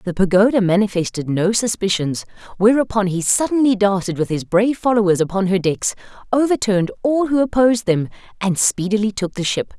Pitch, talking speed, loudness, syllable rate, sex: 205 Hz, 160 wpm, -18 LUFS, 5.7 syllables/s, female